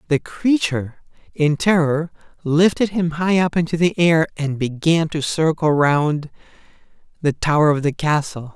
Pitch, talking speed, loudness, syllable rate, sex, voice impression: 155 Hz, 145 wpm, -18 LUFS, 4.5 syllables/s, male, masculine, adult-like, slightly weak, slightly fluent, refreshing, unique